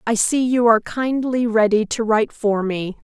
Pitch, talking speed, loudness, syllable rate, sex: 225 Hz, 190 wpm, -19 LUFS, 4.8 syllables/s, female